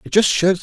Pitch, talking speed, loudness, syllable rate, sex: 190 Hz, 290 wpm, -16 LUFS, 5.2 syllables/s, male